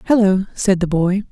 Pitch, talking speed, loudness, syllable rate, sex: 195 Hz, 180 wpm, -17 LUFS, 5.1 syllables/s, female